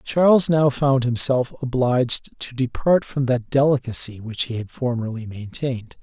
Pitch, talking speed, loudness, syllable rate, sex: 130 Hz, 150 wpm, -20 LUFS, 4.7 syllables/s, male